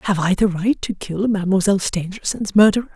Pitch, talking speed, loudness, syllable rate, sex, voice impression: 195 Hz, 185 wpm, -18 LUFS, 6.3 syllables/s, female, very feminine, old, very thin, slightly tensed, powerful, bright, soft, very clear, very fluent, raspy, cool, very intellectual, very refreshing, sincere, slightly calm, slightly friendly, slightly reassuring, very unique, elegant, very wild, slightly sweet, very lively, very intense, sharp, light